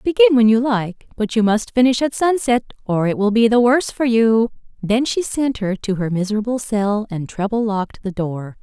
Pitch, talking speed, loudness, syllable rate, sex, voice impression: 225 Hz, 215 wpm, -18 LUFS, 5.1 syllables/s, female, very feminine, very adult-like, thin, tensed, slightly powerful, very bright, very soft, very clear, very fluent, very cute, intellectual, very refreshing, sincere, calm, very friendly, very reassuring, very unique, very elegant, very sweet, very lively, very kind, slightly sharp, slightly modest, light